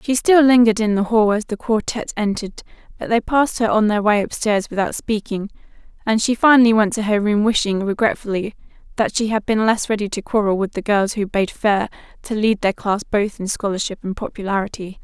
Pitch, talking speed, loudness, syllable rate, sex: 215 Hz, 205 wpm, -18 LUFS, 5.8 syllables/s, female